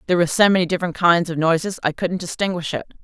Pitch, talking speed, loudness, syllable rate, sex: 170 Hz, 235 wpm, -19 LUFS, 7.6 syllables/s, female